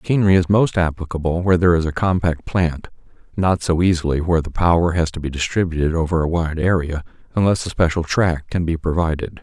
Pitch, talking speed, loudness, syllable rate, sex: 85 Hz, 195 wpm, -19 LUFS, 6.2 syllables/s, male